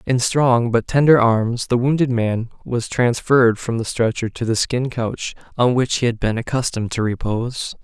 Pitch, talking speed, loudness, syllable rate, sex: 120 Hz, 190 wpm, -19 LUFS, 4.8 syllables/s, male